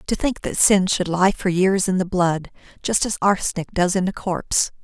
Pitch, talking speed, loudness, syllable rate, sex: 185 Hz, 225 wpm, -20 LUFS, 5.0 syllables/s, female